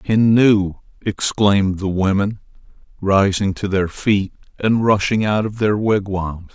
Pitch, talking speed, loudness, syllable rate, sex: 100 Hz, 130 wpm, -18 LUFS, 4.0 syllables/s, male